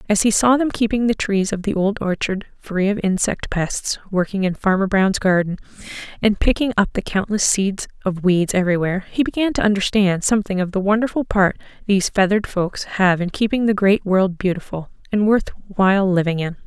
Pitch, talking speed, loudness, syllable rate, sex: 195 Hz, 190 wpm, -19 LUFS, 5.4 syllables/s, female